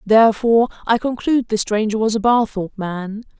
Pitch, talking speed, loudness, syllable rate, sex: 220 Hz, 160 wpm, -18 LUFS, 5.8 syllables/s, female